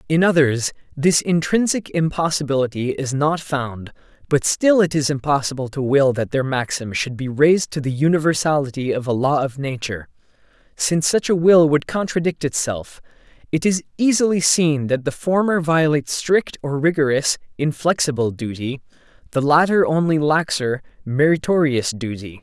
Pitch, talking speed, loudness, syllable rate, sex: 145 Hz, 145 wpm, -19 LUFS, 4.9 syllables/s, male